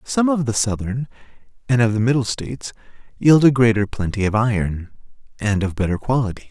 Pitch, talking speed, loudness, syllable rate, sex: 115 Hz, 175 wpm, -19 LUFS, 5.7 syllables/s, male